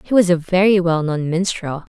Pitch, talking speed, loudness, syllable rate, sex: 175 Hz, 215 wpm, -17 LUFS, 5.0 syllables/s, female